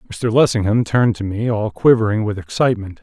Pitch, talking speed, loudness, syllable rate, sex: 110 Hz, 180 wpm, -17 LUFS, 6.0 syllables/s, male